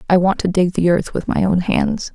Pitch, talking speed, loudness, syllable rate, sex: 185 Hz, 280 wpm, -17 LUFS, 5.1 syllables/s, female